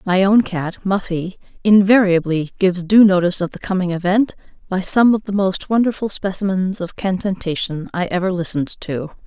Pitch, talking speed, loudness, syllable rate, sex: 190 Hz, 160 wpm, -18 LUFS, 5.3 syllables/s, female